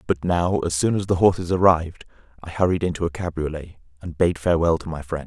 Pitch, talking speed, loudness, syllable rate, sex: 85 Hz, 215 wpm, -21 LUFS, 6.1 syllables/s, male